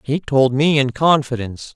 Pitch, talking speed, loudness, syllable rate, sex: 135 Hz, 170 wpm, -17 LUFS, 5.0 syllables/s, male